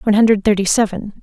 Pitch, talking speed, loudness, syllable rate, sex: 210 Hz, 195 wpm, -15 LUFS, 6.7 syllables/s, female